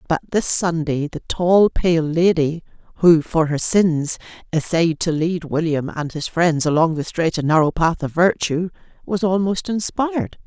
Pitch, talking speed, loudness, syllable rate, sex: 170 Hz, 165 wpm, -19 LUFS, 4.3 syllables/s, female